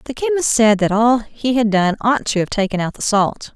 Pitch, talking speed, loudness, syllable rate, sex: 225 Hz, 255 wpm, -17 LUFS, 5.1 syllables/s, female